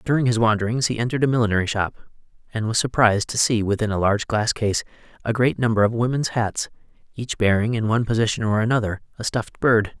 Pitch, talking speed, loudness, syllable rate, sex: 115 Hz, 205 wpm, -21 LUFS, 6.6 syllables/s, male